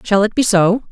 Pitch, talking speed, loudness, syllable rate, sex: 210 Hz, 265 wpm, -14 LUFS, 4.9 syllables/s, female